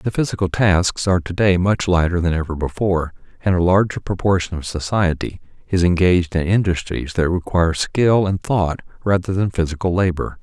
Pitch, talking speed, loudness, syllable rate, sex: 90 Hz, 175 wpm, -19 LUFS, 5.4 syllables/s, male